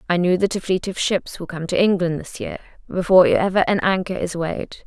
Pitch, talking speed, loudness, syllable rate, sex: 180 Hz, 235 wpm, -20 LUFS, 5.7 syllables/s, female